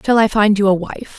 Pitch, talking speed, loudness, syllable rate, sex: 205 Hz, 305 wpm, -15 LUFS, 5.6 syllables/s, female